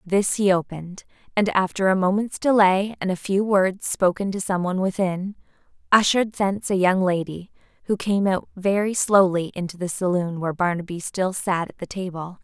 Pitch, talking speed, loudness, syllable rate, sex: 190 Hz, 180 wpm, -22 LUFS, 5.2 syllables/s, female